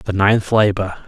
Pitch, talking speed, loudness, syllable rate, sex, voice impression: 100 Hz, 170 wpm, -16 LUFS, 4.2 syllables/s, male, masculine, adult-like, slightly middle-aged, slightly relaxed, slightly weak, slightly dark, slightly hard, muffled, slightly fluent, slightly raspy, cool, intellectual, sincere, very calm, mature, reassuring, slightly wild, slightly lively, slightly strict, slightly intense